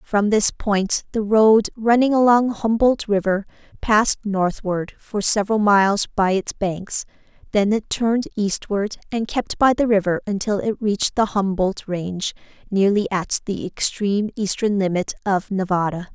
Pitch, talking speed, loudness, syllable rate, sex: 205 Hz, 150 wpm, -20 LUFS, 4.5 syllables/s, female